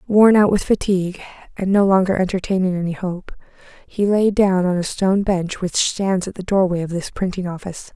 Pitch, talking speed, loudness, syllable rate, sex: 190 Hz, 195 wpm, -19 LUFS, 5.5 syllables/s, female